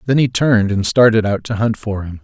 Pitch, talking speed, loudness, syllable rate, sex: 110 Hz, 270 wpm, -15 LUFS, 5.8 syllables/s, male